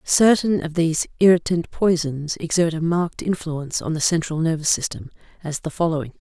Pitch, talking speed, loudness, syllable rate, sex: 165 Hz, 165 wpm, -21 LUFS, 5.6 syllables/s, female